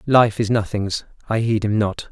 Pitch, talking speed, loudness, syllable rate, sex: 110 Hz, 200 wpm, -20 LUFS, 4.6 syllables/s, male